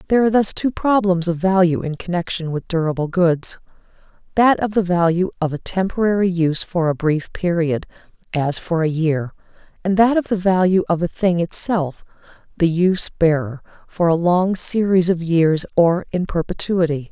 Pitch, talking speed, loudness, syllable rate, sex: 175 Hz, 170 wpm, -18 LUFS, 5.0 syllables/s, female